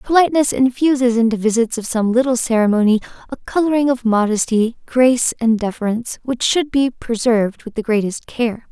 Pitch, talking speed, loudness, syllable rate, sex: 240 Hz, 160 wpm, -17 LUFS, 5.5 syllables/s, female